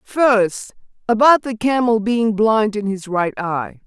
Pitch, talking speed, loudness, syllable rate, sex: 215 Hz, 155 wpm, -17 LUFS, 3.5 syllables/s, female